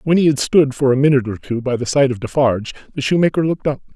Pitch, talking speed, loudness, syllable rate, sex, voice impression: 135 Hz, 275 wpm, -17 LUFS, 7.0 syllables/s, male, very masculine, old, very thick, slightly tensed, very powerful, bright, very soft, very muffled, very fluent, raspy, very cool, intellectual, refreshing, sincere, very calm, very mature, very friendly, very reassuring, very unique, very elegant, wild, very sweet, lively, very kind